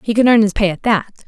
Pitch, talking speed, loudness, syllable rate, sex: 215 Hz, 330 wpm, -15 LUFS, 6.0 syllables/s, female